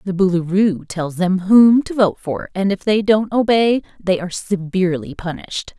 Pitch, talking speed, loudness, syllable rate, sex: 195 Hz, 175 wpm, -17 LUFS, 4.8 syllables/s, female